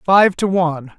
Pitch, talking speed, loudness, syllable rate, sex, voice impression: 175 Hz, 185 wpm, -16 LUFS, 4.6 syllables/s, male, masculine, adult-like, slightly middle-aged, slightly thick, relaxed, slightly weak, slightly dark, slightly soft, slightly muffled, slightly fluent, slightly cool, slightly intellectual, sincere, calm, slightly friendly, slightly reassuring, very unique, slightly wild, lively, kind, very modest